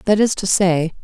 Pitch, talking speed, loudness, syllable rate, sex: 190 Hz, 230 wpm, -17 LUFS, 4.3 syllables/s, female